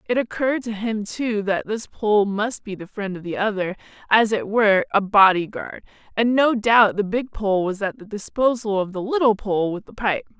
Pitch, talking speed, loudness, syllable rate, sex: 210 Hz, 215 wpm, -21 LUFS, 4.9 syllables/s, female